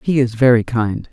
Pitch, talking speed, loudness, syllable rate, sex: 120 Hz, 215 wpm, -15 LUFS, 5.0 syllables/s, male